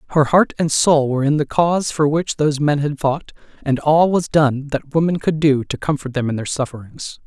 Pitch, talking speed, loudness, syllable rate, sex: 145 Hz, 230 wpm, -18 LUFS, 5.4 syllables/s, male